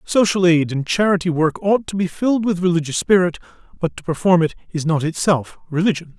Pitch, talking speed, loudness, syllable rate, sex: 175 Hz, 195 wpm, -18 LUFS, 5.7 syllables/s, male